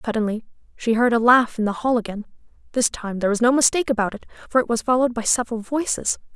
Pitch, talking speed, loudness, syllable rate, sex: 235 Hz, 215 wpm, -20 LUFS, 7.1 syllables/s, female